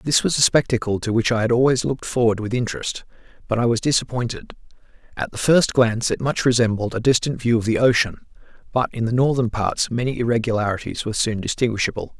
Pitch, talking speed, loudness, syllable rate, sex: 120 Hz, 195 wpm, -20 LUFS, 6.3 syllables/s, male